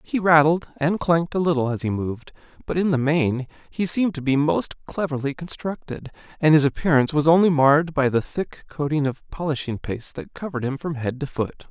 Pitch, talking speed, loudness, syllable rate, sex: 150 Hz, 205 wpm, -22 LUFS, 5.7 syllables/s, male